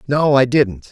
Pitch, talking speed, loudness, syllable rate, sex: 135 Hz, 195 wpm, -15 LUFS, 3.9 syllables/s, male